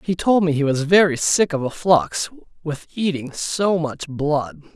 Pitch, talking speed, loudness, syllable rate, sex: 160 Hz, 190 wpm, -20 LUFS, 4.1 syllables/s, male